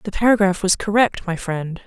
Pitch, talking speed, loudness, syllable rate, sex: 195 Hz, 195 wpm, -19 LUFS, 5.3 syllables/s, female